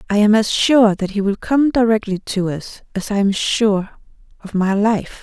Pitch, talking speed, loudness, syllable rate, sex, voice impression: 210 Hz, 205 wpm, -17 LUFS, 4.5 syllables/s, female, feminine, very adult-like, slightly muffled, slightly sincere, calm, sweet